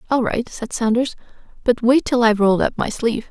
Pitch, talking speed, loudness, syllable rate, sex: 235 Hz, 220 wpm, -19 LUFS, 6.1 syllables/s, female